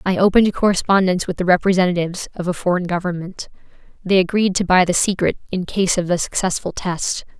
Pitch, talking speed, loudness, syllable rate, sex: 185 Hz, 180 wpm, -18 LUFS, 6.2 syllables/s, female